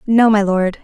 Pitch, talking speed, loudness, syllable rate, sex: 210 Hz, 215 wpm, -14 LUFS, 4.5 syllables/s, female